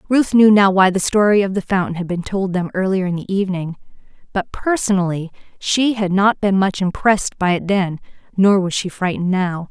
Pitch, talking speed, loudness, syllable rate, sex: 190 Hz, 205 wpm, -17 LUFS, 5.5 syllables/s, female